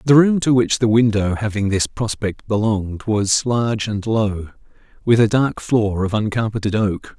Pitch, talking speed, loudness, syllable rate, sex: 110 Hz, 175 wpm, -18 LUFS, 4.6 syllables/s, male